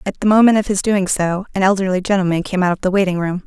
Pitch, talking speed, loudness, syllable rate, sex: 190 Hz, 275 wpm, -16 LUFS, 6.8 syllables/s, female